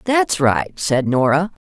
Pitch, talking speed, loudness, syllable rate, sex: 160 Hz, 145 wpm, -17 LUFS, 3.6 syllables/s, female